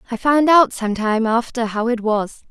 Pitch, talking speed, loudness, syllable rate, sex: 235 Hz, 215 wpm, -17 LUFS, 4.6 syllables/s, female